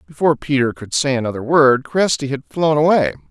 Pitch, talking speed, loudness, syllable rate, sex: 135 Hz, 180 wpm, -17 LUFS, 5.7 syllables/s, male